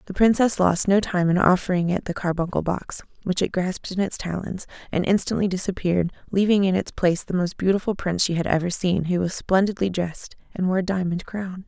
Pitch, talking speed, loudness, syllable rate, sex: 185 Hz, 210 wpm, -23 LUFS, 5.9 syllables/s, female